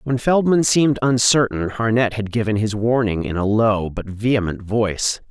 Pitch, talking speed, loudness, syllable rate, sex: 115 Hz, 170 wpm, -19 LUFS, 4.9 syllables/s, male